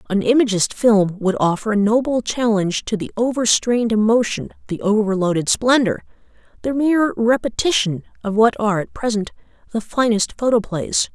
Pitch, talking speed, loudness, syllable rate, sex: 220 Hz, 145 wpm, -18 LUFS, 5.3 syllables/s, female